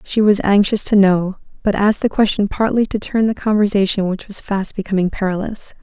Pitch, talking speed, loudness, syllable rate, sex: 200 Hz, 195 wpm, -17 LUFS, 5.5 syllables/s, female